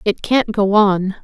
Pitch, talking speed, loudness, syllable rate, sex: 205 Hz, 195 wpm, -15 LUFS, 3.7 syllables/s, female